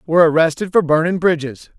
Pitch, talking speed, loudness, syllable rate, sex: 165 Hz, 170 wpm, -16 LUFS, 6.3 syllables/s, male